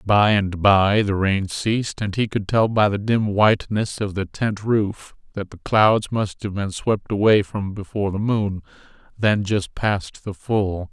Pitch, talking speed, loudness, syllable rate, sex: 105 Hz, 190 wpm, -20 LUFS, 4.1 syllables/s, male